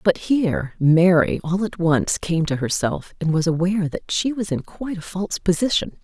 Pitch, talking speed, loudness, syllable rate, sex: 180 Hz, 200 wpm, -21 LUFS, 5.1 syllables/s, female